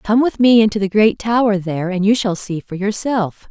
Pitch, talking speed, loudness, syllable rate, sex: 205 Hz, 240 wpm, -16 LUFS, 5.2 syllables/s, female